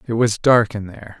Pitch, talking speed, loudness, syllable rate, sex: 110 Hz, 250 wpm, -17 LUFS, 5.8 syllables/s, male